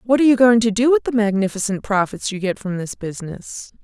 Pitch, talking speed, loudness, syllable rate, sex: 215 Hz, 235 wpm, -18 LUFS, 6.0 syllables/s, female